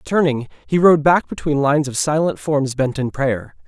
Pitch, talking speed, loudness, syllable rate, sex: 140 Hz, 195 wpm, -18 LUFS, 4.8 syllables/s, male